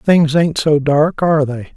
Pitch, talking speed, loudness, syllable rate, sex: 150 Hz, 205 wpm, -14 LUFS, 4.2 syllables/s, male